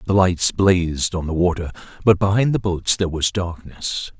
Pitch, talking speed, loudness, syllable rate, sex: 90 Hz, 185 wpm, -19 LUFS, 4.9 syllables/s, male